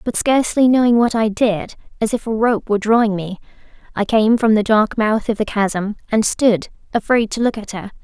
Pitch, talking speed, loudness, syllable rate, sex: 220 Hz, 215 wpm, -17 LUFS, 5.2 syllables/s, female